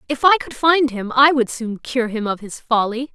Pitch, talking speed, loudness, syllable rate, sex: 255 Hz, 250 wpm, -18 LUFS, 4.8 syllables/s, female